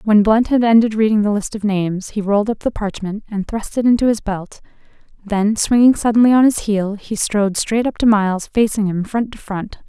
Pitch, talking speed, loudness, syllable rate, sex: 210 Hz, 225 wpm, -17 LUFS, 5.4 syllables/s, female